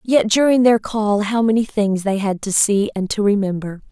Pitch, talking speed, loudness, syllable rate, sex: 210 Hz, 215 wpm, -17 LUFS, 4.9 syllables/s, female